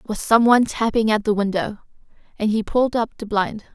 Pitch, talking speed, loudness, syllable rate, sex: 220 Hz, 210 wpm, -20 LUFS, 6.3 syllables/s, female